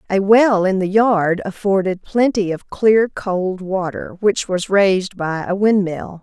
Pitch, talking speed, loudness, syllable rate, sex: 195 Hz, 165 wpm, -17 LUFS, 3.9 syllables/s, female